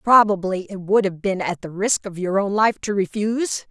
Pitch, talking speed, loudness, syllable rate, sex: 200 Hz, 225 wpm, -21 LUFS, 5.1 syllables/s, female